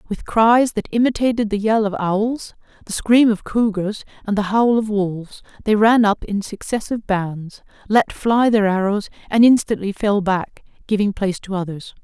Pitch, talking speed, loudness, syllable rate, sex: 210 Hz, 175 wpm, -18 LUFS, 4.8 syllables/s, female